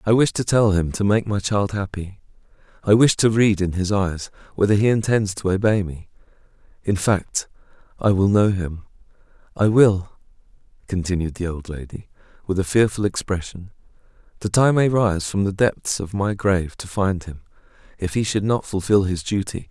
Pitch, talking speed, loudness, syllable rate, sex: 100 Hz, 175 wpm, -20 LUFS, 5.0 syllables/s, male